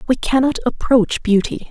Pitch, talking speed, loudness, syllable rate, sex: 245 Hz, 140 wpm, -17 LUFS, 4.7 syllables/s, female